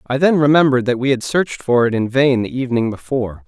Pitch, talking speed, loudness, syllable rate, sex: 130 Hz, 240 wpm, -16 LUFS, 6.6 syllables/s, male